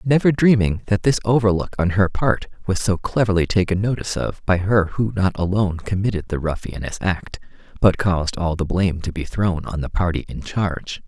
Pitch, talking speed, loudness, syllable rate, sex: 95 Hz, 195 wpm, -20 LUFS, 5.5 syllables/s, male